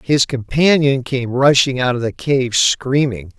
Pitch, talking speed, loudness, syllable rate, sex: 130 Hz, 160 wpm, -16 LUFS, 3.9 syllables/s, male